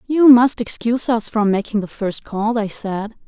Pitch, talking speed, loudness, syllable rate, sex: 225 Hz, 200 wpm, -18 LUFS, 4.6 syllables/s, female